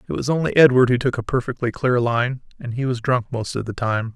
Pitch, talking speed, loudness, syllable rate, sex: 125 Hz, 260 wpm, -20 LUFS, 5.9 syllables/s, male